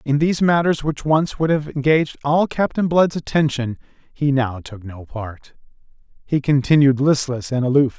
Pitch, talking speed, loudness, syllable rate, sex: 140 Hz, 165 wpm, -19 LUFS, 4.9 syllables/s, male